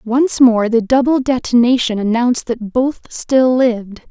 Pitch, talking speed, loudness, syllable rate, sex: 240 Hz, 145 wpm, -14 LUFS, 4.4 syllables/s, female